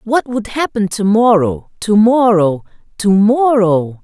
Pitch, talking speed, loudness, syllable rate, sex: 215 Hz, 135 wpm, -13 LUFS, 3.7 syllables/s, female